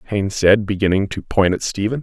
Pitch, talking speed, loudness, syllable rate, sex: 100 Hz, 210 wpm, -18 LUFS, 6.0 syllables/s, male